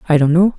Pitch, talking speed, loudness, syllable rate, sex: 170 Hz, 305 wpm, -13 LUFS, 7.5 syllables/s, female